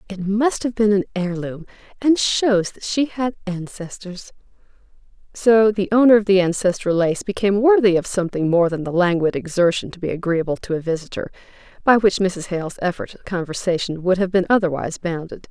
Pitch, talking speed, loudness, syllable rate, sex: 190 Hz, 180 wpm, -19 LUFS, 5.5 syllables/s, female